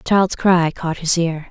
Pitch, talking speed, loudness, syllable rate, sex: 170 Hz, 240 wpm, -17 LUFS, 4.1 syllables/s, female